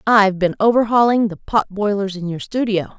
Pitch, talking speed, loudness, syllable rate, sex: 205 Hz, 180 wpm, -17 LUFS, 5.3 syllables/s, female